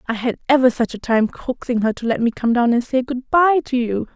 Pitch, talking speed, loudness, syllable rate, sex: 245 Hz, 275 wpm, -19 LUFS, 6.1 syllables/s, female